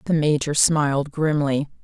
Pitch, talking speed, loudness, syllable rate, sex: 145 Hz, 130 wpm, -20 LUFS, 4.5 syllables/s, female